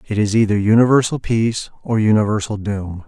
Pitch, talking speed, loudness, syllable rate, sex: 110 Hz, 155 wpm, -17 LUFS, 5.7 syllables/s, male